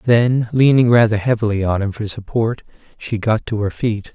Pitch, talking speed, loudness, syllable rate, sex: 110 Hz, 190 wpm, -17 LUFS, 5.0 syllables/s, male